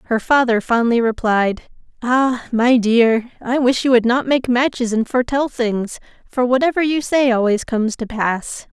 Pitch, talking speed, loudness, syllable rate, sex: 240 Hz, 170 wpm, -17 LUFS, 4.5 syllables/s, female